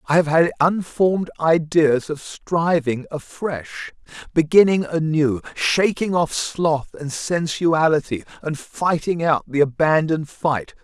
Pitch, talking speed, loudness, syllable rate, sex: 160 Hz, 115 wpm, -20 LUFS, 3.8 syllables/s, male